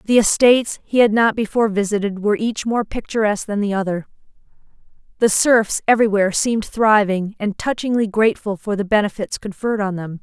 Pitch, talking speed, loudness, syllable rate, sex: 210 Hz, 165 wpm, -18 LUFS, 5.9 syllables/s, female